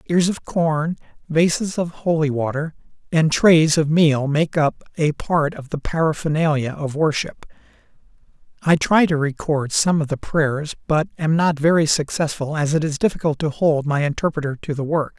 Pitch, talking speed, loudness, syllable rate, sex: 155 Hz, 175 wpm, -20 LUFS, 4.8 syllables/s, male